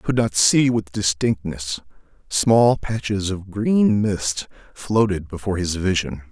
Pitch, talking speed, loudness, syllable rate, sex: 100 Hz, 140 wpm, -20 LUFS, 4.1 syllables/s, male